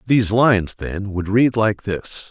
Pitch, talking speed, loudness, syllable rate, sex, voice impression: 105 Hz, 180 wpm, -19 LUFS, 4.3 syllables/s, male, masculine, middle-aged, thick, tensed, powerful, hard, clear, fluent, slightly cool, calm, mature, wild, strict, slightly intense, slightly sharp